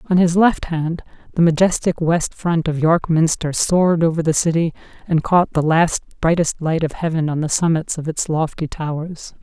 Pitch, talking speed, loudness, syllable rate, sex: 165 Hz, 190 wpm, -18 LUFS, 4.9 syllables/s, female